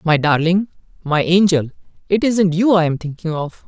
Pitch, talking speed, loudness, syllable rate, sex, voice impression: 175 Hz, 180 wpm, -17 LUFS, 4.9 syllables/s, male, masculine, adult-like, slightly refreshing, friendly, slightly unique